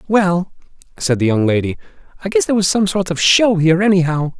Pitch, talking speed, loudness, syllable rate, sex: 175 Hz, 205 wpm, -15 LUFS, 6.0 syllables/s, male